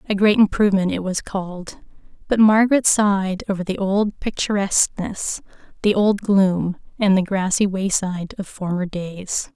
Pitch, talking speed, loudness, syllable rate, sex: 195 Hz, 145 wpm, -19 LUFS, 4.7 syllables/s, female